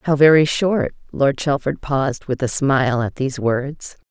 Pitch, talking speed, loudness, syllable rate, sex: 140 Hz, 175 wpm, -18 LUFS, 4.6 syllables/s, female